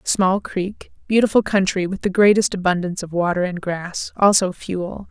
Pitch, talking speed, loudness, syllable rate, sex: 190 Hz, 155 wpm, -19 LUFS, 4.8 syllables/s, female